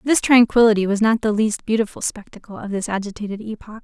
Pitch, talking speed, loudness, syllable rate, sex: 215 Hz, 190 wpm, -19 LUFS, 6.2 syllables/s, female